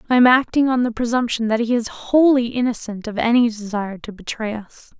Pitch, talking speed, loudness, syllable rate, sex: 235 Hz, 205 wpm, -19 LUFS, 5.7 syllables/s, female